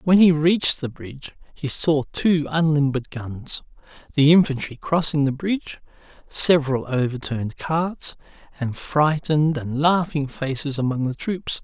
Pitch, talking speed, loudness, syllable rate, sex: 150 Hz, 135 wpm, -21 LUFS, 4.6 syllables/s, male